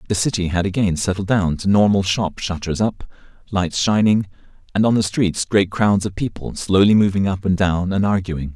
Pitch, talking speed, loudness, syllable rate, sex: 95 Hz, 190 wpm, -19 LUFS, 5.1 syllables/s, male